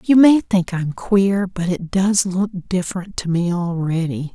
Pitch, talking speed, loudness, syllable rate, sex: 185 Hz, 180 wpm, -19 LUFS, 4.0 syllables/s, female